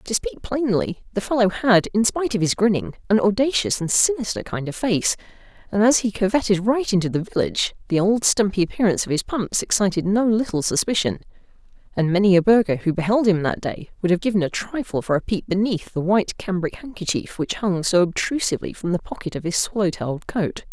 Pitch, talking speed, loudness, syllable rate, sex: 200 Hz, 205 wpm, -21 LUFS, 5.8 syllables/s, female